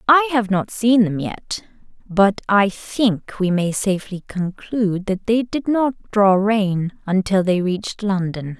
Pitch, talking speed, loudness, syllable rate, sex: 200 Hz, 160 wpm, -19 LUFS, 4.0 syllables/s, female